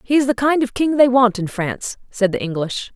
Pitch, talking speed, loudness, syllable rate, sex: 235 Hz, 265 wpm, -18 LUFS, 5.5 syllables/s, female